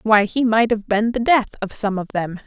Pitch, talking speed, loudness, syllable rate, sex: 215 Hz, 265 wpm, -19 LUFS, 5.1 syllables/s, female